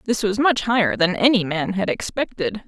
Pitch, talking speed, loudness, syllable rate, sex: 215 Hz, 200 wpm, -20 LUFS, 5.1 syllables/s, female